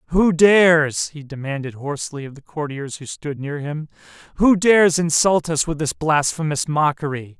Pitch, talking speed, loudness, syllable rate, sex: 155 Hz, 155 wpm, -19 LUFS, 4.9 syllables/s, male